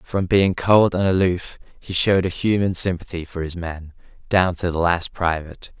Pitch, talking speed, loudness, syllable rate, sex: 90 Hz, 185 wpm, -20 LUFS, 4.9 syllables/s, male